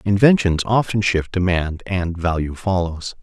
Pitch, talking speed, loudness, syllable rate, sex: 95 Hz, 130 wpm, -19 LUFS, 4.3 syllables/s, male